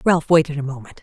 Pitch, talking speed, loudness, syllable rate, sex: 150 Hz, 235 wpm, -18 LUFS, 6.5 syllables/s, female